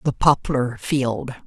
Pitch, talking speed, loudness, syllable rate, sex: 130 Hz, 125 wpm, -21 LUFS, 3.3 syllables/s, male